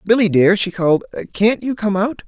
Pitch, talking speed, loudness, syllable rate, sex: 205 Hz, 210 wpm, -16 LUFS, 5.4 syllables/s, male